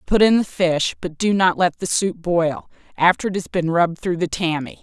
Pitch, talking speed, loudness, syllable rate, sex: 175 Hz, 235 wpm, -19 LUFS, 5.1 syllables/s, female